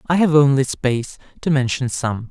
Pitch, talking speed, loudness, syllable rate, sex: 135 Hz, 180 wpm, -18 LUFS, 5.1 syllables/s, male